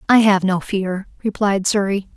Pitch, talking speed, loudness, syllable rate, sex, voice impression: 200 Hz, 165 wpm, -18 LUFS, 4.5 syllables/s, female, very feminine, slightly middle-aged, slightly thin, tensed, powerful, slightly dark, slightly hard, clear, slightly fluent, slightly cool, intellectual, slightly refreshing, sincere, slightly calm, slightly friendly, slightly reassuring, slightly unique, slightly wild, slightly sweet, slightly lively, slightly strict, slightly intense